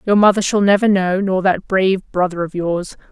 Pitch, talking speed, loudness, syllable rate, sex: 190 Hz, 210 wpm, -16 LUFS, 5.4 syllables/s, female